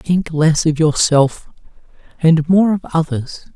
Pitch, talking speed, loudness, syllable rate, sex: 160 Hz, 135 wpm, -15 LUFS, 3.6 syllables/s, male